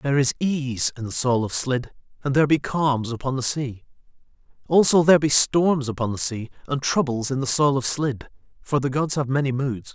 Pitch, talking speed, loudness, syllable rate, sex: 135 Hz, 210 wpm, -22 LUFS, 5.3 syllables/s, male